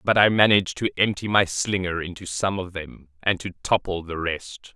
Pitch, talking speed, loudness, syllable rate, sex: 90 Hz, 200 wpm, -23 LUFS, 5.0 syllables/s, male